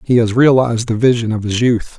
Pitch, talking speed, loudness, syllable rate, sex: 115 Hz, 240 wpm, -14 LUFS, 5.8 syllables/s, male